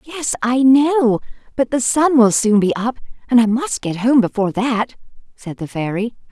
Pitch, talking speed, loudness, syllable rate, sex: 240 Hz, 190 wpm, -16 LUFS, 4.7 syllables/s, female